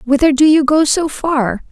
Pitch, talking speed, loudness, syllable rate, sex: 290 Hz, 210 wpm, -13 LUFS, 4.5 syllables/s, female